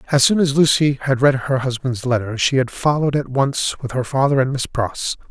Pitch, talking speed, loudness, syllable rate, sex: 130 Hz, 225 wpm, -18 LUFS, 5.3 syllables/s, male